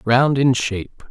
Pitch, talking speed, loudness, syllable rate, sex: 125 Hz, 165 wpm, -17 LUFS, 4.0 syllables/s, male